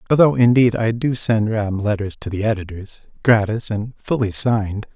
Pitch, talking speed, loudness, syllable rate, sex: 110 Hz, 170 wpm, -19 LUFS, 4.8 syllables/s, male